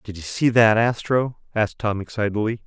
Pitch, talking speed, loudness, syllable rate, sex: 110 Hz, 180 wpm, -21 LUFS, 5.4 syllables/s, male